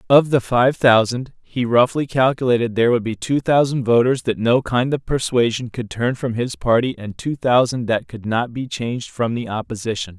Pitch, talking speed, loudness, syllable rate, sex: 120 Hz, 200 wpm, -19 LUFS, 5.0 syllables/s, male